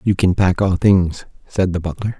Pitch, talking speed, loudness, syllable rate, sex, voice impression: 90 Hz, 220 wpm, -17 LUFS, 4.8 syllables/s, male, masculine, slightly middle-aged, slightly powerful, slightly mature, reassuring, elegant, sweet